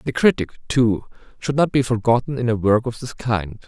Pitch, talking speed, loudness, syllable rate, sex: 120 Hz, 215 wpm, -20 LUFS, 5.3 syllables/s, male